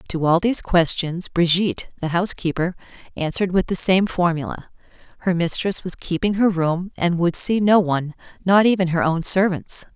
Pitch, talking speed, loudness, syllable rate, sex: 180 Hz, 170 wpm, -20 LUFS, 5.3 syllables/s, female